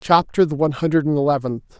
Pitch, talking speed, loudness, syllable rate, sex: 145 Hz, 200 wpm, -19 LUFS, 7.1 syllables/s, male